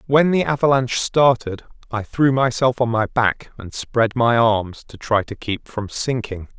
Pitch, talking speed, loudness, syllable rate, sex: 120 Hz, 180 wpm, -19 LUFS, 4.3 syllables/s, male